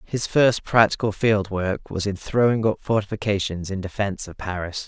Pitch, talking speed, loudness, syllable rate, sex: 100 Hz, 170 wpm, -22 LUFS, 5.0 syllables/s, male